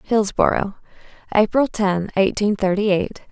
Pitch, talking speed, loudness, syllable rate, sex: 205 Hz, 110 wpm, -19 LUFS, 4.4 syllables/s, female